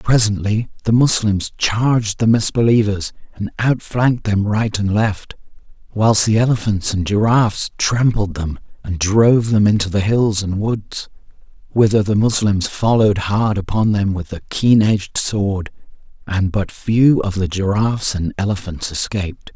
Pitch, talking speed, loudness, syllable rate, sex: 105 Hz, 145 wpm, -17 LUFS, 4.5 syllables/s, male